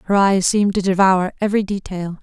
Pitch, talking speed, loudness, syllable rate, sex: 195 Hz, 190 wpm, -17 LUFS, 6.1 syllables/s, female